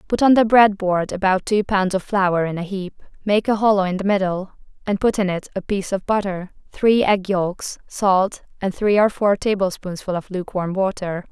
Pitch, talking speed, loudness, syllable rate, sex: 195 Hz, 205 wpm, -20 LUFS, 5.0 syllables/s, female